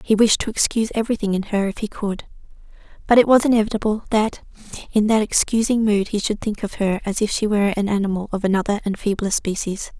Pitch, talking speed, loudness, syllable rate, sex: 210 Hz, 205 wpm, -20 LUFS, 6.3 syllables/s, female